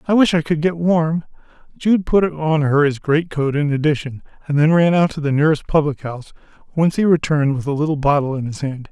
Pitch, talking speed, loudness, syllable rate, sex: 155 Hz, 230 wpm, -18 LUFS, 6.0 syllables/s, male